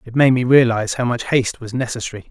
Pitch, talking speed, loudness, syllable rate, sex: 120 Hz, 235 wpm, -17 LUFS, 6.8 syllables/s, male